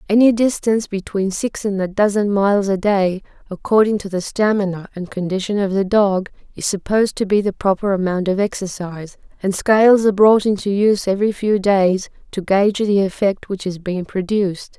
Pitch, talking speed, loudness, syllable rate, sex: 200 Hz, 185 wpm, -18 LUFS, 5.4 syllables/s, female